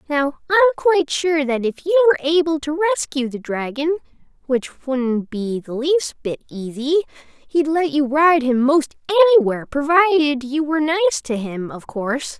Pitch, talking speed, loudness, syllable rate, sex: 295 Hz, 170 wpm, -19 LUFS, 5.2 syllables/s, female